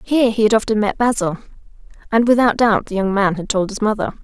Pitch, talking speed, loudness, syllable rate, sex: 215 Hz, 225 wpm, -17 LUFS, 6.3 syllables/s, female